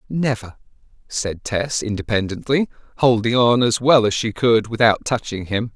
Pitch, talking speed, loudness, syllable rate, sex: 115 Hz, 145 wpm, -19 LUFS, 4.6 syllables/s, male